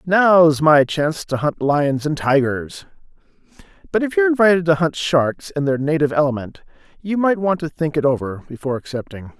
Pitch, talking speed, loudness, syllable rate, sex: 155 Hz, 180 wpm, -18 LUFS, 5.4 syllables/s, male